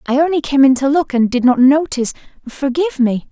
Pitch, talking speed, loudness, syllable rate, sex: 275 Hz, 215 wpm, -14 LUFS, 6.0 syllables/s, female